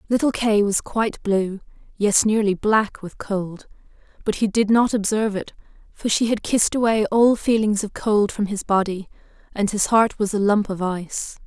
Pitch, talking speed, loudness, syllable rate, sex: 210 Hz, 190 wpm, -20 LUFS, 4.9 syllables/s, female